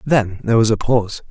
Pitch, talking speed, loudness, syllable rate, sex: 115 Hz, 230 wpm, -17 LUFS, 6.3 syllables/s, male